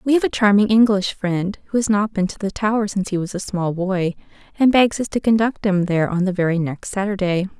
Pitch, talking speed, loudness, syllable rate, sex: 200 Hz, 245 wpm, -19 LUFS, 5.9 syllables/s, female